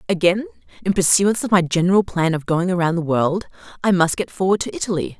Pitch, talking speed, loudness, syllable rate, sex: 190 Hz, 210 wpm, -19 LUFS, 6.1 syllables/s, female